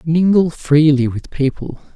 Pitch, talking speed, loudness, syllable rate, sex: 150 Hz, 125 wpm, -15 LUFS, 4.1 syllables/s, male